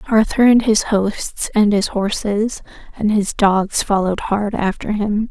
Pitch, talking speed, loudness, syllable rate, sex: 210 Hz, 160 wpm, -17 LUFS, 4.0 syllables/s, female